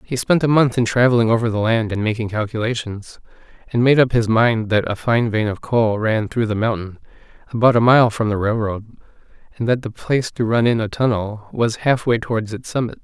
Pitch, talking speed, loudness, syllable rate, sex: 115 Hz, 220 wpm, -18 LUFS, 5.5 syllables/s, male